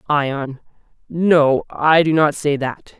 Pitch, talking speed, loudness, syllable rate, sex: 150 Hz, 140 wpm, -17 LUFS, 3.0 syllables/s, male